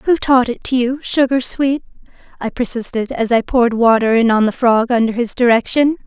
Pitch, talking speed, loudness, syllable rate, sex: 245 Hz, 200 wpm, -15 LUFS, 5.2 syllables/s, female